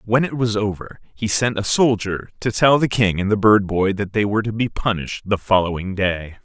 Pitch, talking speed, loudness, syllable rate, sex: 105 Hz, 235 wpm, -19 LUFS, 5.3 syllables/s, male